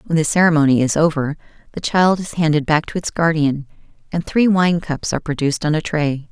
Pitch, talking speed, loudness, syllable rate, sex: 155 Hz, 210 wpm, -17 LUFS, 5.8 syllables/s, female